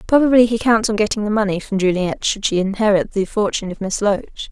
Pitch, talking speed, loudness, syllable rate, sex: 210 Hz, 225 wpm, -18 LUFS, 6.0 syllables/s, female